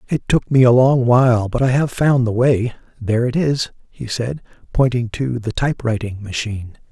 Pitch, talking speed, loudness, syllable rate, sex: 120 Hz, 190 wpm, -17 LUFS, 5.1 syllables/s, male